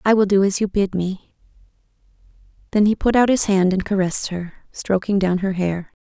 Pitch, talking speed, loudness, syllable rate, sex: 195 Hz, 200 wpm, -19 LUFS, 5.6 syllables/s, female